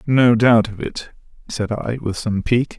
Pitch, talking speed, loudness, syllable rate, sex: 115 Hz, 195 wpm, -18 LUFS, 4.4 syllables/s, male